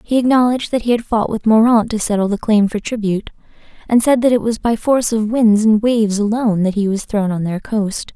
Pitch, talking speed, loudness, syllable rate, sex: 220 Hz, 245 wpm, -16 LUFS, 5.9 syllables/s, female